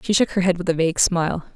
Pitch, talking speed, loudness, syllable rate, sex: 175 Hz, 310 wpm, -20 LUFS, 7.2 syllables/s, female